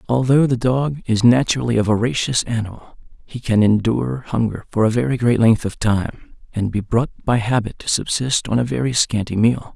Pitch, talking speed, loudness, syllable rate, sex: 115 Hz, 190 wpm, -18 LUFS, 5.2 syllables/s, male